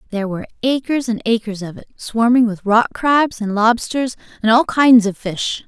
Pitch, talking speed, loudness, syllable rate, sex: 230 Hz, 190 wpm, -17 LUFS, 5.0 syllables/s, female